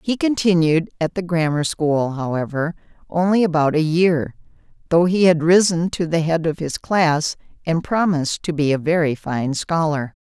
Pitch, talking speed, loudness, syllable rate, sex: 165 Hz, 170 wpm, -19 LUFS, 4.7 syllables/s, female